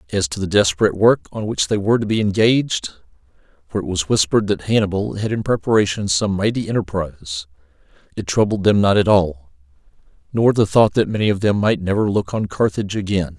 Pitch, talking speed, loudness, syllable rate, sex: 100 Hz, 185 wpm, -18 LUFS, 6.1 syllables/s, male